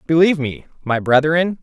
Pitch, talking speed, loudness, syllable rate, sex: 150 Hz, 145 wpm, -17 LUFS, 5.3 syllables/s, male